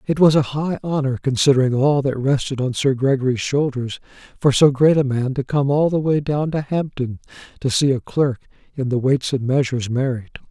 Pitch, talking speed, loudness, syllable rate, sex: 135 Hz, 205 wpm, -19 LUFS, 5.4 syllables/s, male